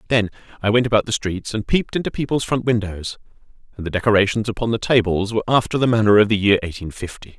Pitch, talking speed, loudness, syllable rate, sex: 110 Hz, 220 wpm, -19 LUFS, 6.8 syllables/s, male